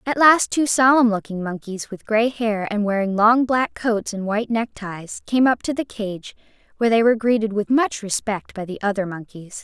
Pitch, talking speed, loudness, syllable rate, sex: 220 Hz, 205 wpm, -20 LUFS, 5.0 syllables/s, female